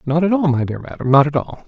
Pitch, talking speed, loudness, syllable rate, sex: 145 Hz, 325 wpm, -17 LUFS, 6.5 syllables/s, male